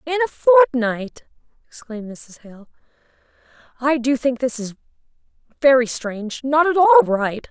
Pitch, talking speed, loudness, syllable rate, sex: 265 Hz, 130 wpm, -18 LUFS, 4.5 syllables/s, female